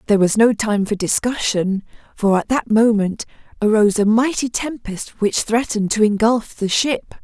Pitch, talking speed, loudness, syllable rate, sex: 220 Hz, 165 wpm, -18 LUFS, 4.9 syllables/s, female